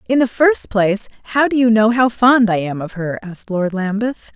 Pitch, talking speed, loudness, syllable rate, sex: 220 Hz, 235 wpm, -16 LUFS, 5.1 syllables/s, female